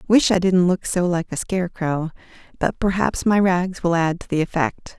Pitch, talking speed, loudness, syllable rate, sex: 175 Hz, 215 wpm, -20 LUFS, 4.8 syllables/s, female